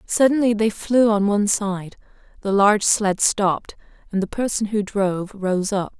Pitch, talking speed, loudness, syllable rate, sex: 205 Hz, 170 wpm, -20 LUFS, 5.0 syllables/s, female